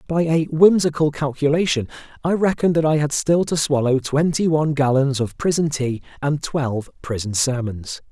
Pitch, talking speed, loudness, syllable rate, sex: 145 Hz, 165 wpm, -20 LUFS, 5.1 syllables/s, male